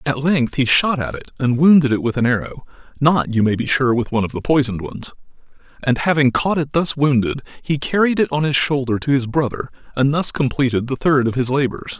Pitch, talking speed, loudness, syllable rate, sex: 135 Hz, 220 wpm, -18 LUFS, 5.8 syllables/s, male